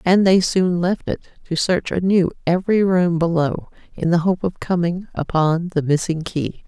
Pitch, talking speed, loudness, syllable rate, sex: 175 Hz, 180 wpm, -19 LUFS, 4.7 syllables/s, female